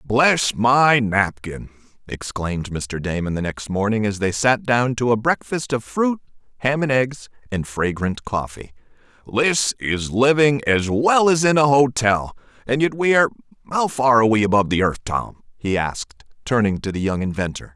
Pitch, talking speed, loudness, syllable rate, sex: 115 Hz, 170 wpm, -19 LUFS, 4.8 syllables/s, male